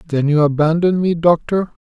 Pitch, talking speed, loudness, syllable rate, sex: 165 Hz, 165 wpm, -15 LUFS, 5.3 syllables/s, male